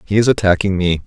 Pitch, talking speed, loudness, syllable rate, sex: 95 Hz, 225 wpm, -15 LUFS, 6.3 syllables/s, male